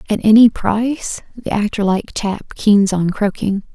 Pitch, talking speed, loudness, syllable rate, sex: 210 Hz, 160 wpm, -16 LUFS, 4.2 syllables/s, female